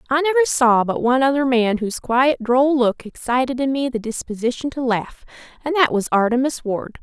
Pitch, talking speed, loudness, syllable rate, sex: 255 Hz, 195 wpm, -19 LUFS, 5.5 syllables/s, female